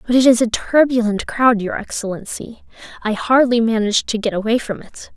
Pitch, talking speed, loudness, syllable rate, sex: 230 Hz, 175 wpm, -17 LUFS, 5.5 syllables/s, female